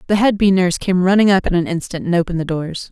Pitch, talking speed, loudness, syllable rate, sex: 185 Hz, 290 wpm, -16 LUFS, 7.0 syllables/s, female